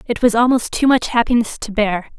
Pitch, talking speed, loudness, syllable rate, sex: 230 Hz, 220 wpm, -16 LUFS, 5.5 syllables/s, female